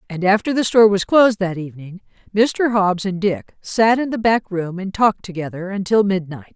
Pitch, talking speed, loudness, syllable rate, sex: 195 Hz, 200 wpm, -18 LUFS, 5.3 syllables/s, female